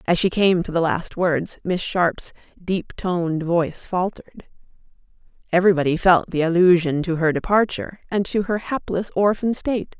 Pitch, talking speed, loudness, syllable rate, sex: 180 Hz, 155 wpm, -21 LUFS, 5.1 syllables/s, female